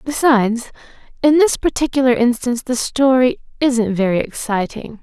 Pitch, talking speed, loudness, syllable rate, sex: 250 Hz, 120 wpm, -16 LUFS, 5.0 syllables/s, female